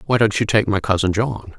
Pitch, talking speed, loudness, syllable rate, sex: 105 Hz, 265 wpm, -18 LUFS, 5.5 syllables/s, male